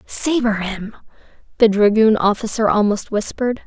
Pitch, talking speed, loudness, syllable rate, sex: 215 Hz, 115 wpm, -17 LUFS, 4.8 syllables/s, female